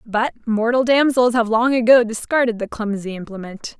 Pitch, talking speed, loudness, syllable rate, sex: 230 Hz, 160 wpm, -18 LUFS, 4.9 syllables/s, female